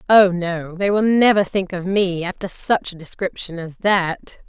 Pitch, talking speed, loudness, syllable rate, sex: 185 Hz, 190 wpm, -19 LUFS, 4.3 syllables/s, female